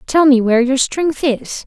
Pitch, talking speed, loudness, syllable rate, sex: 270 Hz, 215 wpm, -14 LUFS, 4.6 syllables/s, female